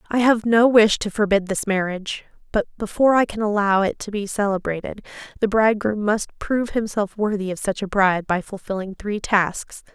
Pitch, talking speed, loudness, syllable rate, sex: 205 Hz, 185 wpm, -21 LUFS, 5.4 syllables/s, female